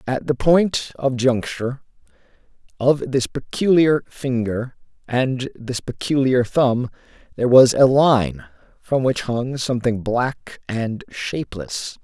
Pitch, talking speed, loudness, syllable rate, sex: 125 Hz, 120 wpm, -20 LUFS, 3.8 syllables/s, male